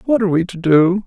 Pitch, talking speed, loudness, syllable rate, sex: 185 Hz, 280 wpm, -15 LUFS, 6.3 syllables/s, male